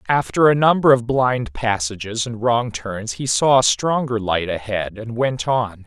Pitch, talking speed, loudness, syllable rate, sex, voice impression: 115 Hz, 185 wpm, -19 LUFS, 4.2 syllables/s, male, masculine, middle-aged, tensed, powerful, clear, slightly halting, cool, mature, friendly, wild, lively, slightly strict